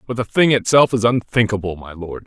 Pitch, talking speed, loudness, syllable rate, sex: 110 Hz, 210 wpm, -17 LUFS, 5.7 syllables/s, male